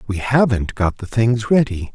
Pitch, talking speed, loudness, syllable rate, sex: 110 Hz, 185 wpm, -18 LUFS, 4.5 syllables/s, male